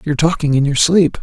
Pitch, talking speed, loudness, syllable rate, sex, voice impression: 155 Hz, 245 wpm, -14 LUFS, 6.2 syllables/s, male, masculine, adult-like, relaxed, slightly dark, soft, raspy, cool, intellectual, calm, friendly, reassuring, kind, modest